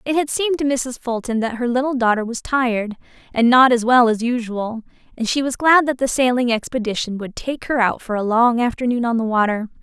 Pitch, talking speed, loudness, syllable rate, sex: 240 Hz, 225 wpm, -18 LUFS, 5.6 syllables/s, female